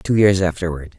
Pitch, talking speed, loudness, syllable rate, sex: 90 Hz, 185 wpm, -18 LUFS, 5.3 syllables/s, male